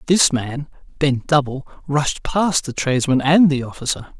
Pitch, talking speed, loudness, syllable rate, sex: 140 Hz, 160 wpm, -18 LUFS, 4.6 syllables/s, male